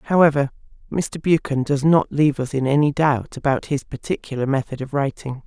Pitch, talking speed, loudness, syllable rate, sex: 140 Hz, 175 wpm, -20 LUFS, 5.4 syllables/s, female